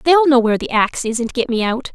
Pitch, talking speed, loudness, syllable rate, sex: 250 Hz, 310 wpm, -16 LUFS, 6.6 syllables/s, female